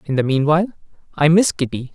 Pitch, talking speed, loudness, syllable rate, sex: 155 Hz, 185 wpm, -17 LUFS, 6.5 syllables/s, male